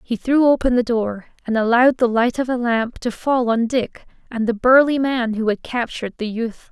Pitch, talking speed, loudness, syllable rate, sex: 240 Hz, 225 wpm, -19 LUFS, 5.0 syllables/s, female